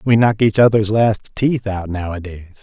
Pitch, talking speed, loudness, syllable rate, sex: 105 Hz, 185 wpm, -16 LUFS, 4.7 syllables/s, male